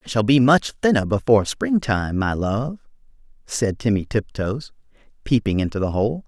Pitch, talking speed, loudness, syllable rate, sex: 115 Hz, 155 wpm, -21 LUFS, 5.0 syllables/s, male